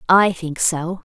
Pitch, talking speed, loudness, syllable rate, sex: 175 Hz, 160 wpm, -19 LUFS, 3.4 syllables/s, female